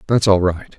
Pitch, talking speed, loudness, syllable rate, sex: 100 Hz, 230 wpm, -16 LUFS, 4.9 syllables/s, male